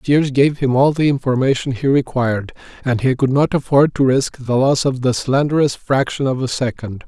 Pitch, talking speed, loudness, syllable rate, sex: 130 Hz, 210 wpm, -17 LUFS, 5.3 syllables/s, male